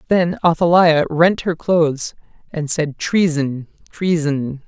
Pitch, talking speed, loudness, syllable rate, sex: 160 Hz, 115 wpm, -17 LUFS, 3.7 syllables/s, female